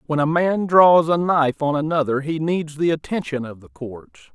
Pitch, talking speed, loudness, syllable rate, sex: 155 Hz, 205 wpm, -19 LUFS, 5.0 syllables/s, male